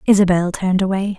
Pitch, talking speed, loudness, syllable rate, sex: 190 Hz, 150 wpm, -17 LUFS, 6.5 syllables/s, female